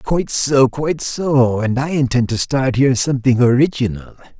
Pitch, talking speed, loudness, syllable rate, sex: 130 Hz, 165 wpm, -16 LUFS, 5.2 syllables/s, male